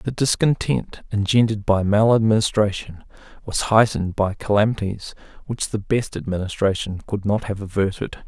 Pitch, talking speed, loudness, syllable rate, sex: 105 Hz, 125 wpm, -21 LUFS, 5.1 syllables/s, male